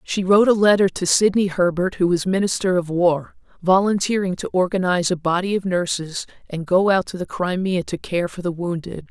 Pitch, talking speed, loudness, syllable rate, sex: 185 Hz, 200 wpm, -20 LUFS, 5.4 syllables/s, female